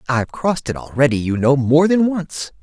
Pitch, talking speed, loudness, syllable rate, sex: 145 Hz, 205 wpm, -17 LUFS, 5.5 syllables/s, male